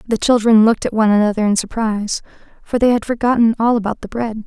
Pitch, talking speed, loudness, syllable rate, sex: 220 Hz, 215 wpm, -16 LUFS, 6.7 syllables/s, female